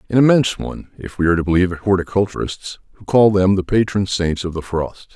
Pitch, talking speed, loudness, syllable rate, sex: 95 Hz, 210 wpm, -17 LUFS, 6.2 syllables/s, male